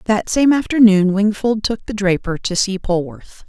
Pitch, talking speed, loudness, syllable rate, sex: 205 Hz, 170 wpm, -16 LUFS, 4.5 syllables/s, female